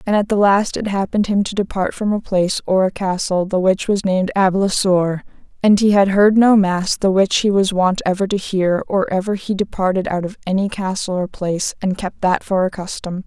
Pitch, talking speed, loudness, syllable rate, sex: 195 Hz, 225 wpm, -17 LUFS, 5.4 syllables/s, female